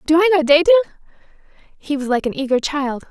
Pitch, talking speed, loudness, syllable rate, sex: 315 Hz, 195 wpm, -16 LUFS, 6.0 syllables/s, female